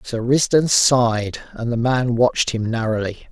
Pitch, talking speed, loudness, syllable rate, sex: 120 Hz, 165 wpm, -18 LUFS, 4.7 syllables/s, male